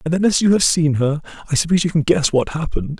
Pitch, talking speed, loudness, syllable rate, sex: 160 Hz, 280 wpm, -17 LUFS, 6.8 syllables/s, male